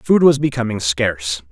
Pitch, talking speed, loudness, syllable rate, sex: 110 Hz, 160 wpm, -17 LUFS, 4.9 syllables/s, male